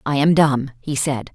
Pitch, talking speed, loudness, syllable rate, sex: 140 Hz, 225 wpm, -19 LUFS, 4.5 syllables/s, female